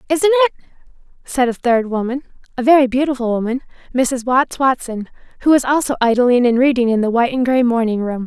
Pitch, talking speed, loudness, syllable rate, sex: 255 Hz, 190 wpm, -16 LUFS, 6.0 syllables/s, female